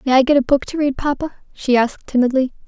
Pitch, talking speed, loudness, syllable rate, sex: 270 Hz, 245 wpm, -18 LUFS, 6.8 syllables/s, female